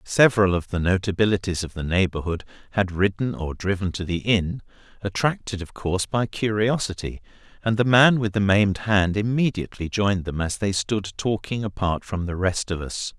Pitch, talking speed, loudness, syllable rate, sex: 100 Hz, 180 wpm, -23 LUFS, 5.3 syllables/s, male